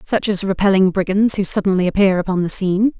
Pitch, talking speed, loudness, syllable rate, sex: 195 Hz, 200 wpm, -17 LUFS, 6.3 syllables/s, female